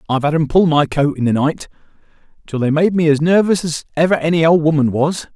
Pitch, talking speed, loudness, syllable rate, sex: 155 Hz, 235 wpm, -15 LUFS, 6.1 syllables/s, male